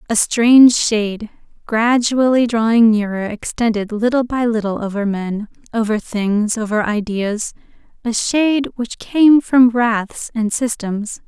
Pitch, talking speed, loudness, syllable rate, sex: 225 Hz, 130 wpm, -16 LUFS, 4.1 syllables/s, female